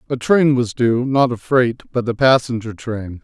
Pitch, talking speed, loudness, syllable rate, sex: 120 Hz, 205 wpm, -17 LUFS, 4.4 syllables/s, male